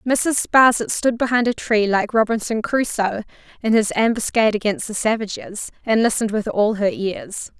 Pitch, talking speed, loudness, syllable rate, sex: 220 Hz, 165 wpm, -19 LUFS, 5.0 syllables/s, female